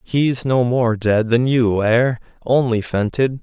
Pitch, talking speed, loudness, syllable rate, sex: 120 Hz, 140 wpm, -17 LUFS, 3.5 syllables/s, male